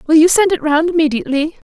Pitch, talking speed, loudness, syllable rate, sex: 315 Hz, 210 wpm, -14 LUFS, 6.8 syllables/s, female